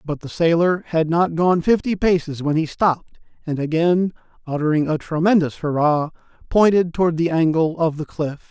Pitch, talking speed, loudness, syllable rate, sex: 165 Hz, 170 wpm, -19 LUFS, 5.0 syllables/s, male